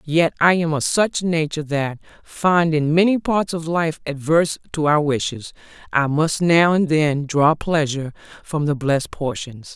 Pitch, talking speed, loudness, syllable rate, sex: 155 Hz, 165 wpm, -19 LUFS, 4.5 syllables/s, female